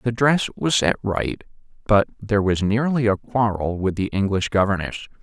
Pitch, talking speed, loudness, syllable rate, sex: 105 Hz, 170 wpm, -21 LUFS, 5.0 syllables/s, male